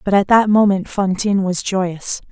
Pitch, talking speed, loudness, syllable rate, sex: 195 Hz, 180 wpm, -16 LUFS, 4.7 syllables/s, female